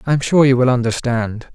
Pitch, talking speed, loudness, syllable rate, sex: 125 Hz, 235 wpm, -16 LUFS, 5.6 syllables/s, male